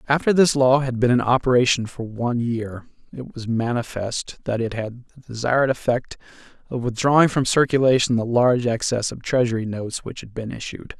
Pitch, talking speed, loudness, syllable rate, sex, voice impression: 120 Hz, 180 wpm, -21 LUFS, 5.6 syllables/s, male, masculine, adult-like, relaxed, slightly bright, slightly muffled, slightly raspy, slightly cool, sincere, calm, mature, friendly, kind, slightly modest